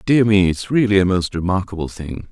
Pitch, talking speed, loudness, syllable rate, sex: 100 Hz, 205 wpm, -17 LUFS, 5.5 syllables/s, male